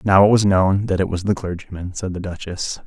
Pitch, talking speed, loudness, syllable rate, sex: 95 Hz, 250 wpm, -19 LUFS, 5.5 syllables/s, male